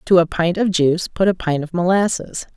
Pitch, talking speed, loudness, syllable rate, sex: 175 Hz, 235 wpm, -18 LUFS, 5.4 syllables/s, female